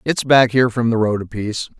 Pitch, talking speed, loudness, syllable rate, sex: 115 Hz, 270 wpm, -17 LUFS, 6.2 syllables/s, male